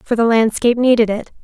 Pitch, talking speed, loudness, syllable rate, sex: 230 Hz, 210 wpm, -15 LUFS, 6.4 syllables/s, female